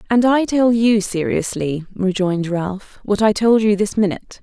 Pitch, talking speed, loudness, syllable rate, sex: 205 Hz, 175 wpm, -17 LUFS, 4.7 syllables/s, female